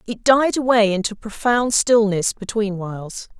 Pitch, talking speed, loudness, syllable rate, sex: 215 Hz, 140 wpm, -18 LUFS, 4.4 syllables/s, female